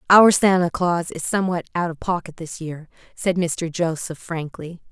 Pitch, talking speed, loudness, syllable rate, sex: 170 Hz, 170 wpm, -21 LUFS, 4.6 syllables/s, female